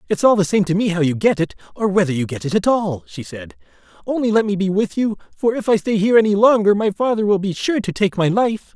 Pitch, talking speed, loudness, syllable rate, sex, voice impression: 195 Hz, 280 wpm, -18 LUFS, 6.1 syllables/s, male, masculine, adult-like, tensed, powerful, slightly muffled, raspy, friendly, unique, wild, lively, intense, slightly sharp